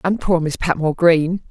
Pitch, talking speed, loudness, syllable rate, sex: 170 Hz, 200 wpm, -17 LUFS, 5.2 syllables/s, female